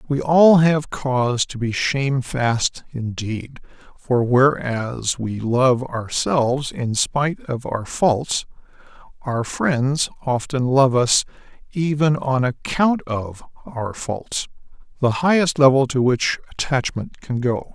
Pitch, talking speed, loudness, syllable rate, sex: 130 Hz, 125 wpm, -20 LUFS, 3.5 syllables/s, male